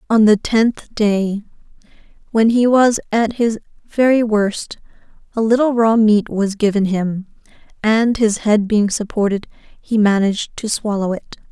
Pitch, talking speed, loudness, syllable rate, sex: 215 Hz, 145 wpm, -16 LUFS, 4.3 syllables/s, female